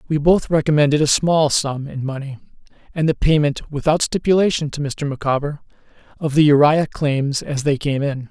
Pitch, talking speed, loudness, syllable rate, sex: 145 Hz, 175 wpm, -18 LUFS, 5.0 syllables/s, male